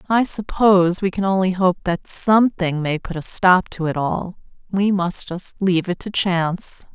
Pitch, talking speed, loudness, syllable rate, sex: 185 Hz, 180 wpm, -19 LUFS, 4.7 syllables/s, female